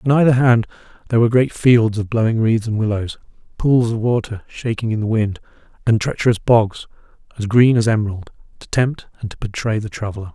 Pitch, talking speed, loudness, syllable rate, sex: 110 Hz, 190 wpm, -18 LUFS, 5.8 syllables/s, male